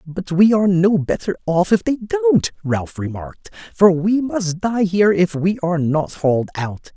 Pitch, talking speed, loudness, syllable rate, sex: 175 Hz, 190 wpm, -18 LUFS, 4.6 syllables/s, male